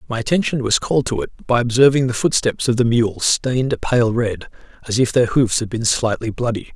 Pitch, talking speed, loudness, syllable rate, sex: 120 Hz, 220 wpm, -18 LUFS, 5.5 syllables/s, male